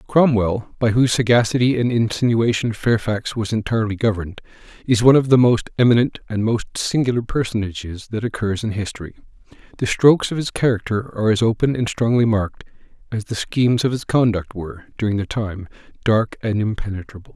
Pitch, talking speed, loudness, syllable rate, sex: 110 Hz, 165 wpm, -19 LUFS, 6.0 syllables/s, male